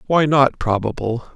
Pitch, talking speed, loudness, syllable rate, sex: 125 Hz, 135 wpm, -18 LUFS, 4.5 syllables/s, male